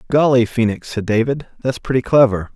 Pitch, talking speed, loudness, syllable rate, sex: 120 Hz, 165 wpm, -17 LUFS, 5.5 syllables/s, male